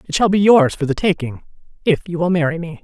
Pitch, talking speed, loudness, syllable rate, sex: 175 Hz, 235 wpm, -17 LUFS, 6.3 syllables/s, female